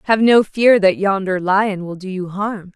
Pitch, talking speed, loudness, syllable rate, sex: 200 Hz, 220 wpm, -16 LUFS, 4.3 syllables/s, female